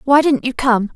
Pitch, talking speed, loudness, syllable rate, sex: 255 Hz, 250 wpm, -16 LUFS, 4.9 syllables/s, female